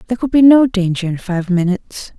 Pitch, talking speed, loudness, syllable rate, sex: 205 Hz, 220 wpm, -14 LUFS, 6.2 syllables/s, female